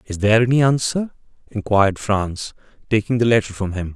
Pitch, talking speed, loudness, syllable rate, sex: 110 Hz, 165 wpm, -18 LUFS, 5.8 syllables/s, male